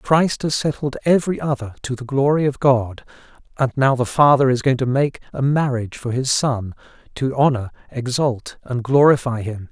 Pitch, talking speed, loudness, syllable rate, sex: 130 Hz, 175 wpm, -19 LUFS, 5.0 syllables/s, male